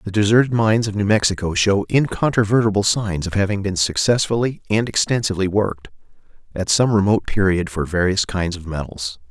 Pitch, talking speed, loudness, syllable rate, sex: 100 Hz, 160 wpm, -19 LUFS, 5.9 syllables/s, male